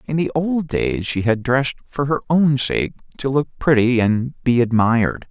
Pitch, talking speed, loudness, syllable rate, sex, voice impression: 130 Hz, 190 wpm, -19 LUFS, 4.5 syllables/s, male, very masculine, very adult-like, middle-aged, very thick, tensed, powerful, slightly bright, very soft, muffled, fluent, cool, very intellectual, slightly refreshing, sincere, very calm, very mature, friendly, very reassuring, very unique, slightly elegant, wild, sweet, very lively, very kind, slightly intense